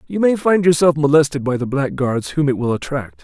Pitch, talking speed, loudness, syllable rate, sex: 145 Hz, 220 wpm, -17 LUFS, 5.5 syllables/s, male